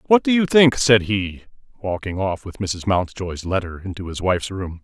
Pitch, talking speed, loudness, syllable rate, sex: 105 Hz, 200 wpm, -20 LUFS, 5.0 syllables/s, male